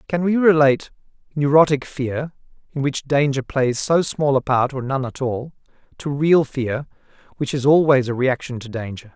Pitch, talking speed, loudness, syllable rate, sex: 140 Hz, 175 wpm, -19 LUFS, 4.8 syllables/s, male